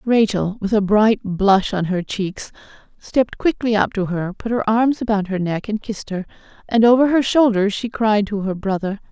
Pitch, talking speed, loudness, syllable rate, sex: 210 Hz, 205 wpm, -19 LUFS, 4.9 syllables/s, female